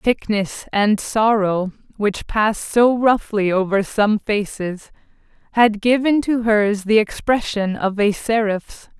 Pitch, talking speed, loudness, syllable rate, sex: 210 Hz, 125 wpm, -18 LUFS, 3.6 syllables/s, female